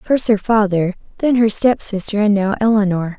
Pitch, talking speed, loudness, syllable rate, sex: 210 Hz, 190 wpm, -16 LUFS, 4.9 syllables/s, female